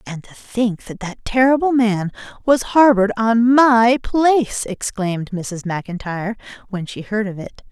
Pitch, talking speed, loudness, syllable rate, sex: 220 Hz, 155 wpm, -18 LUFS, 4.6 syllables/s, female